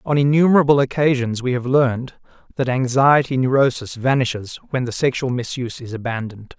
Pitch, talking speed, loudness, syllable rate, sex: 130 Hz, 145 wpm, -19 LUFS, 5.8 syllables/s, male